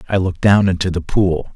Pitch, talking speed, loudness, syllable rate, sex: 90 Hz, 230 wpm, -16 LUFS, 6.1 syllables/s, male